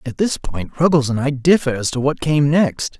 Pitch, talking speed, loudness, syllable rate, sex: 140 Hz, 240 wpm, -17 LUFS, 4.9 syllables/s, male